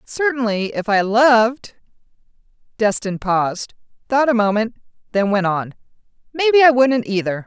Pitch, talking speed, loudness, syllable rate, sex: 225 Hz, 130 wpm, -17 LUFS, 4.7 syllables/s, female